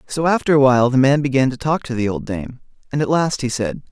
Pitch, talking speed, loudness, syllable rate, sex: 135 Hz, 275 wpm, -18 LUFS, 6.2 syllables/s, male